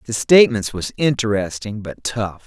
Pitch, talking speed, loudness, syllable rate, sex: 115 Hz, 145 wpm, -18 LUFS, 4.8 syllables/s, male